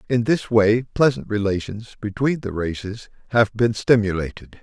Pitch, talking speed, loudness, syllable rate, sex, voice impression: 110 Hz, 145 wpm, -21 LUFS, 4.7 syllables/s, male, masculine, middle-aged, thick, tensed, slightly powerful, slightly halting, slightly calm, friendly, reassuring, wild, lively, slightly strict